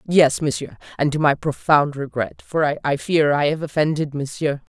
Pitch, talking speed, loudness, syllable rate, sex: 150 Hz, 175 wpm, -20 LUFS, 4.8 syllables/s, female